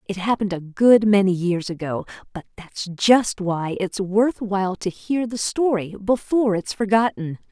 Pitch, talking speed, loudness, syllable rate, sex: 200 Hz, 175 wpm, -21 LUFS, 4.8 syllables/s, female